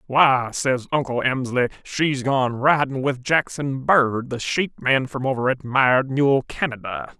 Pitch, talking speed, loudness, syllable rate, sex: 130 Hz, 160 wpm, -21 LUFS, 4.1 syllables/s, male